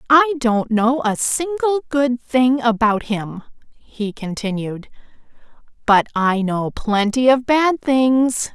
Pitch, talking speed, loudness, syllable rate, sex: 240 Hz, 125 wpm, -18 LUFS, 3.4 syllables/s, female